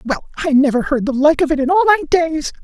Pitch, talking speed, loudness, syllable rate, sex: 295 Hz, 275 wpm, -15 LUFS, 7.5 syllables/s, male